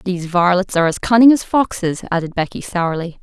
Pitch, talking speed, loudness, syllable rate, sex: 185 Hz, 185 wpm, -16 LUFS, 5.9 syllables/s, female